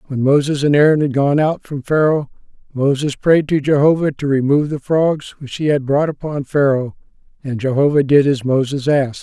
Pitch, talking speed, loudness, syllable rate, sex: 140 Hz, 190 wpm, -16 LUFS, 5.3 syllables/s, male